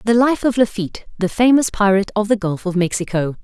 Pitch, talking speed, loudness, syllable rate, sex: 205 Hz, 210 wpm, -17 LUFS, 6.2 syllables/s, female